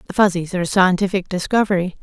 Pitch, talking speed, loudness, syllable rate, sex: 185 Hz, 180 wpm, -18 LUFS, 7.2 syllables/s, female